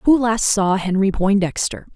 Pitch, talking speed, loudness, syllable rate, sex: 205 Hz, 155 wpm, -18 LUFS, 4.3 syllables/s, female